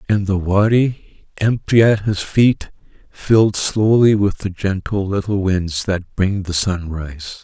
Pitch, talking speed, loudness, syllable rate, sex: 100 Hz, 145 wpm, -17 LUFS, 3.9 syllables/s, male